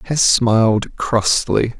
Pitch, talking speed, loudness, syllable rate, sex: 115 Hz, 100 wpm, -16 LUFS, 3.1 syllables/s, male